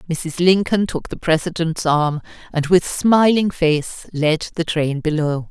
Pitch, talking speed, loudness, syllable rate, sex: 165 Hz, 155 wpm, -18 LUFS, 3.9 syllables/s, female